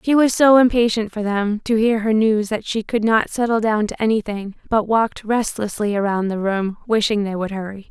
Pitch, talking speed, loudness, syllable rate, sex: 215 Hz, 210 wpm, -19 LUFS, 5.2 syllables/s, female